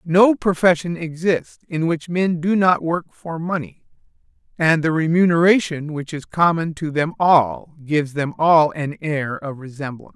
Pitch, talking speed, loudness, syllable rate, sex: 160 Hz, 160 wpm, -19 LUFS, 4.4 syllables/s, male